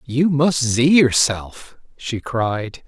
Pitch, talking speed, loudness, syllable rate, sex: 130 Hz, 125 wpm, -18 LUFS, 2.7 syllables/s, male